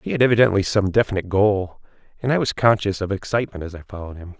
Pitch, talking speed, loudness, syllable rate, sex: 100 Hz, 220 wpm, -20 LUFS, 7.2 syllables/s, male